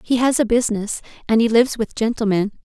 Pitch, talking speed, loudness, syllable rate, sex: 225 Hz, 205 wpm, -19 LUFS, 6.2 syllables/s, female